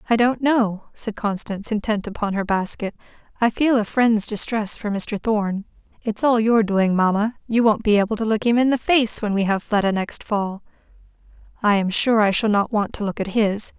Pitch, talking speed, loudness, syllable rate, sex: 215 Hz, 195 wpm, -20 LUFS, 5.1 syllables/s, female